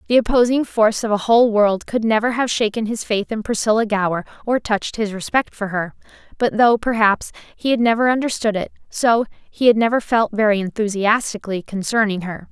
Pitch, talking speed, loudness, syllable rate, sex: 220 Hz, 185 wpm, -18 LUFS, 5.6 syllables/s, female